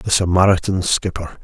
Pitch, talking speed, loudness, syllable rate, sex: 95 Hz, 125 wpm, -17 LUFS, 5.1 syllables/s, male